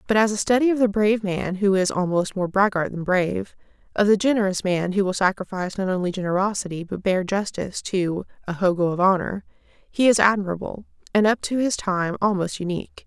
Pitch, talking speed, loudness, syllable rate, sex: 195 Hz, 195 wpm, -22 LUFS, 5.8 syllables/s, female